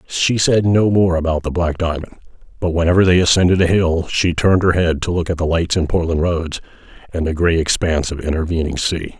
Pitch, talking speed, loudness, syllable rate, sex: 85 Hz, 215 wpm, -17 LUFS, 5.8 syllables/s, male